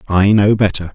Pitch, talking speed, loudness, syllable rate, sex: 100 Hz, 190 wpm, -13 LUFS, 5.2 syllables/s, male